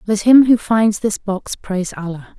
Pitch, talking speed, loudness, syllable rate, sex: 205 Hz, 200 wpm, -15 LUFS, 4.6 syllables/s, female